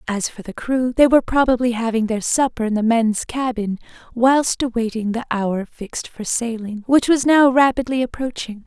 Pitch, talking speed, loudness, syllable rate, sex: 235 Hz, 180 wpm, -19 LUFS, 5.0 syllables/s, female